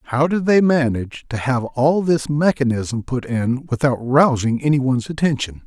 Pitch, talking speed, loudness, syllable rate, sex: 135 Hz, 170 wpm, -19 LUFS, 4.8 syllables/s, male